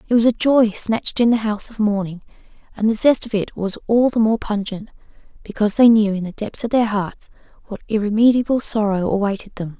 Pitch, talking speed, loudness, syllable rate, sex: 215 Hz, 210 wpm, -18 LUFS, 5.9 syllables/s, female